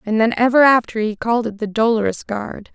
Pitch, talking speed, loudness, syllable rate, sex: 225 Hz, 220 wpm, -17 LUFS, 5.7 syllables/s, female